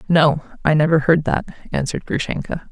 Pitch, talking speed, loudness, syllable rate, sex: 155 Hz, 155 wpm, -19 LUFS, 5.8 syllables/s, female